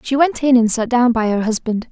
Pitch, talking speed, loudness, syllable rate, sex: 240 Hz, 280 wpm, -16 LUFS, 5.5 syllables/s, female